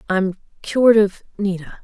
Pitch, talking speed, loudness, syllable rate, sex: 200 Hz, 100 wpm, -18 LUFS, 4.7 syllables/s, female